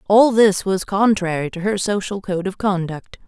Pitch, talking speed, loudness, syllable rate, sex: 195 Hz, 185 wpm, -19 LUFS, 4.5 syllables/s, female